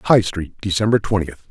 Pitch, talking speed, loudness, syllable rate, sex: 100 Hz, 160 wpm, -19 LUFS, 5.0 syllables/s, male